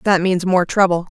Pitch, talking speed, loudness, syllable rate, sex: 185 Hz, 210 wpm, -16 LUFS, 5.0 syllables/s, female